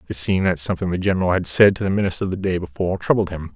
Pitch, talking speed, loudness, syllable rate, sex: 90 Hz, 270 wpm, -20 LUFS, 7.7 syllables/s, male